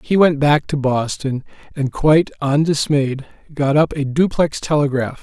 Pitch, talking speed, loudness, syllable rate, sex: 145 Hz, 150 wpm, -17 LUFS, 4.5 syllables/s, male